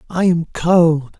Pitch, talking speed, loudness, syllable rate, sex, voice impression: 165 Hz, 150 wpm, -15 LUFS, 3.0 syllables/s, male, masculine, adult-like, cool, slightly refreshing, sincere, kind